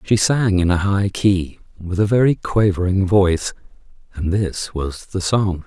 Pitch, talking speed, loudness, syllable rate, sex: 95 Hz, 170 wpm, -18 LUFS, 4.2 syllables/s, male